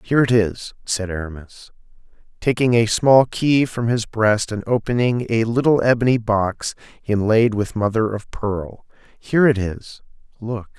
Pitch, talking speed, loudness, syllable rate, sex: 110 Hz, 150 wpm, -19 LUFS, 4.4 syllables/s, male